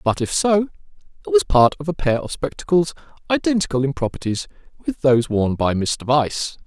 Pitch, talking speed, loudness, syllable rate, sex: 150 Hz, 180 wpm, -20 LUFS, 5.5 syllables/s, male